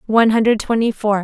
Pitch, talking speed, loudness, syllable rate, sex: 220 Hz, 195 wpm, -16 LUFS, 6.3 syllables/s, female